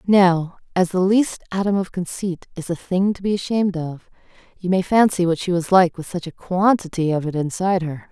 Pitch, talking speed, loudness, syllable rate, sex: 180 Hz, 215 wpm, -20 LUFS, 5.3 syllables/s, female